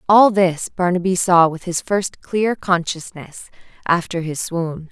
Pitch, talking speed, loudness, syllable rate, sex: 180 Hz, 145 wpm, -18 LUFS, 3.9 syllables/s, female